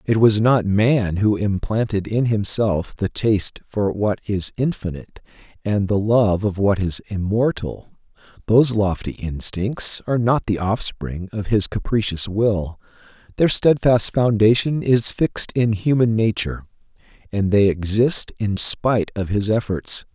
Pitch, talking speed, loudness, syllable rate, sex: 105 Hz, 145 wpm, -19 LUFS, 4.3 syllables/s, male